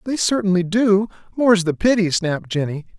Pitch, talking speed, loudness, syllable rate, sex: 195 Hz, 160 wpm, -18 LUFS, 5.7 syllables/s, male